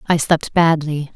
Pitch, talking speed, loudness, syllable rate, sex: 155 Hz, 155 wpm, -17 LUFS, 4.0 syllables/s, female